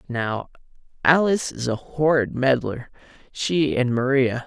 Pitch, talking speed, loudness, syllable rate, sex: 130 Hz, 105 wpm, -22 LUFS, 4.1 syllables/s, male